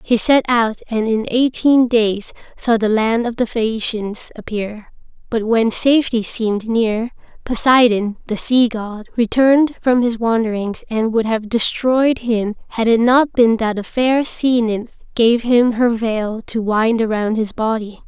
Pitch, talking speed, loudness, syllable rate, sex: 230 Hz, 165 wpm, -17 LUFS, 4.0 syllables/s, female